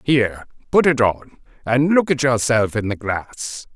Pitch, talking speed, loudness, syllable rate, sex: 120 Hz, 175 wpm, -19 LUFS, 4.5 syllables/s, male